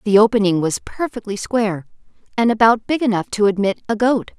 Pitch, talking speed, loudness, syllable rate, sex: 215 Hz, 180 wpm, -18 LUFS, 5.7 syllables/s, female